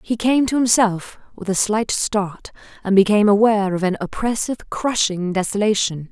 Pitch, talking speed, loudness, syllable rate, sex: 210 Hz, 155 wpm, -18 LUFS, 5.2 syllables/s, female